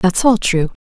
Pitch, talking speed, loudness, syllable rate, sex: 200 Hz, 220 wpm, -15 LUFS, 4.2 syllables/s, female